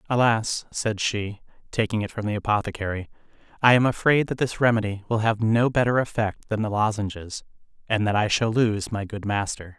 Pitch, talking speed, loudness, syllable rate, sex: 110 Hz, 185 wpm, -24 LUFS, 5.3 syllables/s, male